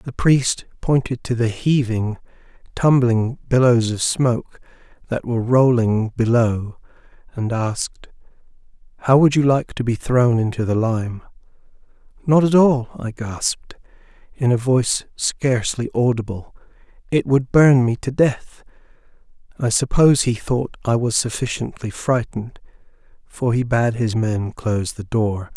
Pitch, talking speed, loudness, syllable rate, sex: 120 Hz, 135 wpm, -19 LUFS, 4.4 syllables/s, male